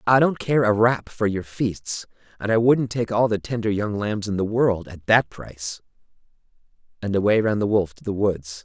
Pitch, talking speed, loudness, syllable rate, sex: 105 Hz, 215 wpm, -22 LUFS, 4.9 syllables/s, male